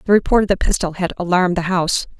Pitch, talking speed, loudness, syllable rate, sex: 180 Hz, 245 wpm, -18 LUFS, 7.3 syllables/s, female